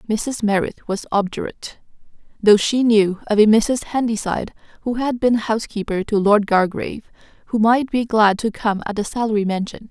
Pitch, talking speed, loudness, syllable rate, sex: 215 Hz, 170 wpm, -19 LUFS, 5.5 syllables/s, female